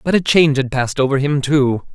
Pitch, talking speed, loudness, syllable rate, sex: 140 Hz, 245 wpm, -16 LUFS, 6.2 syllables/s, male